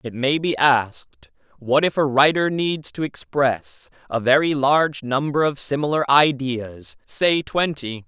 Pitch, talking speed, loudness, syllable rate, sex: 135 Hz, 150 wpm, -20 LUFS, 4.1 syllables/s, male